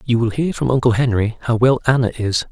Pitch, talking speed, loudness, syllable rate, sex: 120 Hz, 240 wpm, -17 LUFS, 5.7 syllables/s, male